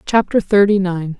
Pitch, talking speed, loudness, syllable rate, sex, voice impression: 195 Hz, 150 wpm, -15 LUFS, 4.7 syllables/s, female, feminine, adult-like, slightly powerful, slightly bright, fluent, slightly raspy, intellectual, calm, friendly, kind, slightly modest